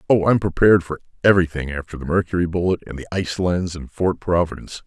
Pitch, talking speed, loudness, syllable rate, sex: 85 Hz, 195 wpm, -20 LUFS, 6.7 syllables/s, male